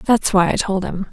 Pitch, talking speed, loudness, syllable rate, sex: 195 Hz, 320 wpm, -18 LUFS, 5.7 syllables/s, female